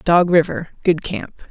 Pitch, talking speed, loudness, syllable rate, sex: 170 Hz, 120 wpm, -18 LUFS, 4.5 syllables/s, female